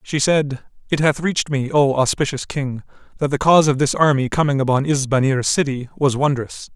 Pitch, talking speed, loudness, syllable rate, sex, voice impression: 140 Hz, 185 wpm, -18 LUFS, 5.4 syllables/s, male, very masculine, middle-aged, very thick, tensed, powerful, bright, soft, slightly clear, fluent, cool, intellectual, refreshing, sincere, calm, mature, friendly, very reassuring, unique, elegant, wild, slightly sweet, lively, strict, slightly intense